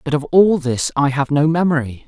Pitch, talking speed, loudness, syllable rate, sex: 150 Hz, 230 wpm, -16 LUFS, 5.4 syllables/s, male